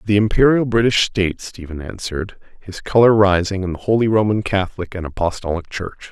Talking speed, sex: 165 wpm, male